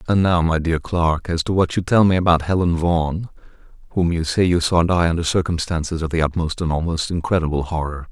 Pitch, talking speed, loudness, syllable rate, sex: 85 Hz, 215 wpm, -19 LUFS, 5.9 syllables/s, male